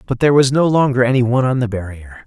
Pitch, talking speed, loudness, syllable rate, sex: 125 Hz, 265 wpm, -15 LUFS, 7.3 syllables/s, male